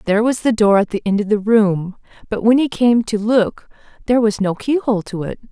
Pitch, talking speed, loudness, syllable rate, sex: 215 Hz, 250 wpm, -17 LUFS, 5.5 syllables/s, female